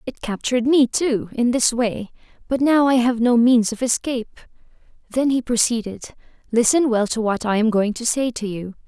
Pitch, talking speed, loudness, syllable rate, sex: 235 Hz, 195 wpm, -19 LUFS, 5.2 syllables/s, female